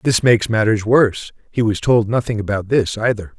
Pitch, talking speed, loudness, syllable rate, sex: 110 Hz, 195 wpm, -17 LUFS, 5.5 syllables/s, male